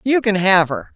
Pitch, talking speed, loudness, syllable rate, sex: 205 Hz, 250 wpm, -16 LUFS, 4.7 syllables/s, female